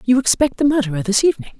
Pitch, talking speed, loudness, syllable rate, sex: 235 Hz, 225 wpm, -17 LUFS, 7.7 syllables/s, female